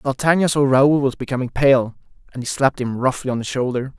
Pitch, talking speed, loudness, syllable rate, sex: 130 Hz, 210 wpm, -19 LUFS, 6.0 syllables/s, male